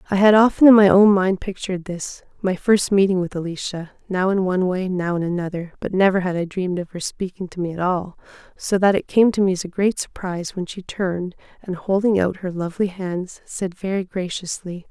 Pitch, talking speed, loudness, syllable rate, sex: 185 Hz, 220 wpm, -20 LUFS, 5.6 syllables/s, female